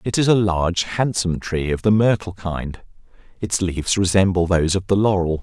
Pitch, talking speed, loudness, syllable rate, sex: 95 Hz, 190 wpm, -19 LUFS, 5.4 syllables/s, male